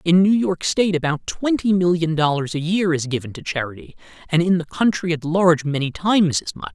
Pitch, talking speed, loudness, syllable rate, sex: 165 Hz, 215 wpm, -20 LUFS, 5.7 syllables/s, male